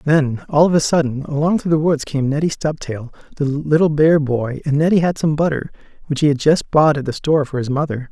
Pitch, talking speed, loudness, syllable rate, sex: 150 Hz, 235 wpm, -17 LUFS, 5.7 syllables/s, male